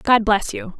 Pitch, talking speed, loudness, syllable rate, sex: 235 Hz, 225 wpm, -19 LUFS, 4.0 syllables/s, female